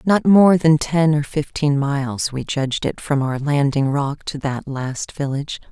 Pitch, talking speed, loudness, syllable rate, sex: 145 Hz, 190 wpm, -19 LUFS, 4.4 syllables/s, female